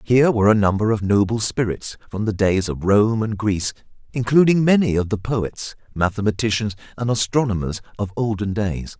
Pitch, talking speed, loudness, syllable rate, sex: 105 Hz, 165 wpm, -20 LUFS, 5.4 syllables/s, male